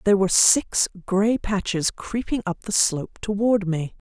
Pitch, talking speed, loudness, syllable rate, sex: 200 Hz, 160 wpm, -22 LUFS, 4.6 syllables/s, female